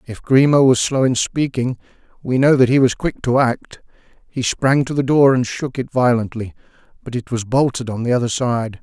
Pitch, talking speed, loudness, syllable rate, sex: 125 Hz, 210 wpm, -17 LUFS, 5.1 syllables/s, male